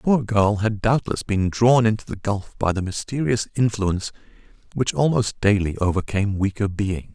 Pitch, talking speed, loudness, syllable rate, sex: 105 Hz, 170 wpm, -22 LUFS, 5.0 syllables/s, male